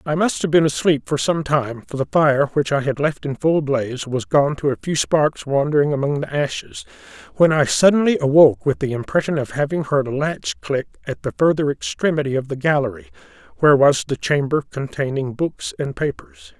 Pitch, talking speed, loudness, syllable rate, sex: 145 Hz, 205 wpm, -19 LUFS, 5.4 syllables/s, male